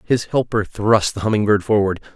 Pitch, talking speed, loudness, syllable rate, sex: 105 Hz, 195 wpm, -18 LUFS, 5.2 syllables/s, male